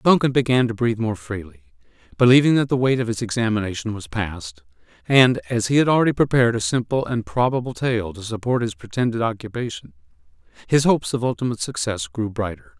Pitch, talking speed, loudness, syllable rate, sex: 115 Hz, 180 wpm, -21 LUFS, 6.1 syllables/s, male